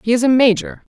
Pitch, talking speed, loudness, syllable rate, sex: 240 Hz, 255 wpm, -15 LUFS, 6.5 syllables/s, female